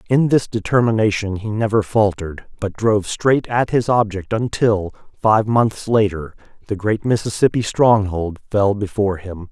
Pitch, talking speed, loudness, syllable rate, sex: 105 Hz, 145 wpm, -18 LUFS, 4.7 syllables/s, male